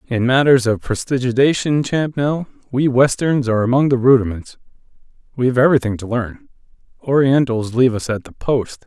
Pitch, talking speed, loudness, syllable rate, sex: 125 Hz, 130 wpm, -17 LUFS, 5.6 syllables/s, male